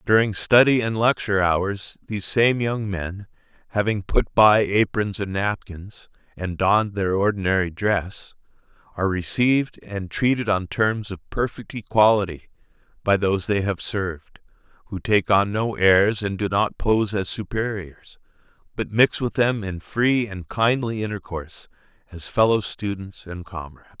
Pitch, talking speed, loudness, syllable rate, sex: 100 Hz, 150 wpm, -22 LUFS, 4.5 syllables/s, male